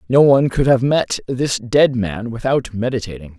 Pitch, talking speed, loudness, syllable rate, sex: 120 Hz, 175 wpm, -17 LUFS, 4.8 syllables/s, male